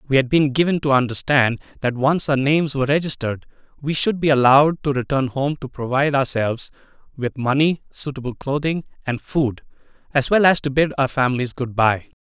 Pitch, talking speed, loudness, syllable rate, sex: 140 Hz, 180 wpm, -19 LUFS, 5.8 syllables/s, male